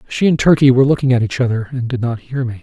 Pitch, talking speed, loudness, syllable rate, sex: 125 Hz, 300 wpm, -15 LUFS, 7.0 syllables/s, male